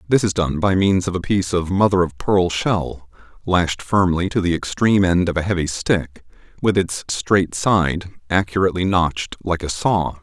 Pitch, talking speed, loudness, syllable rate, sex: 90 Hz, 190 wpm, -19 LUFS, 4.7 syllables/s, male